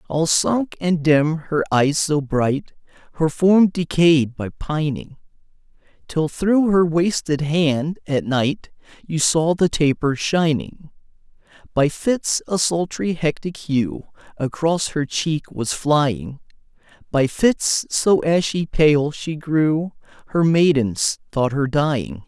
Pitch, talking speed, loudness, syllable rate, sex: 155 Hz, 130 wpm, -19 LUFS, 3.3 syllables/s, male